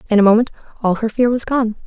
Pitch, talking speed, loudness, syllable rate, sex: 225 Hz, 255 wpm, -16 LUFS, 7.1 syllables/s, female